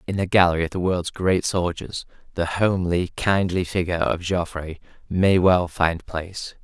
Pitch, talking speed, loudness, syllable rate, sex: 90 Hz, 165 wpm, -22 LUFS, 4.8 syllables/s, male